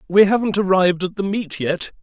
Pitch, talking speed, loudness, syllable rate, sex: 190 Hz, 205 wpm, -18 LUFS, 5.7 syllables/s, male